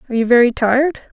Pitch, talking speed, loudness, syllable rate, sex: 250 Hz, 205 wpm, -15 LUFS, 7.4 syllables/s, female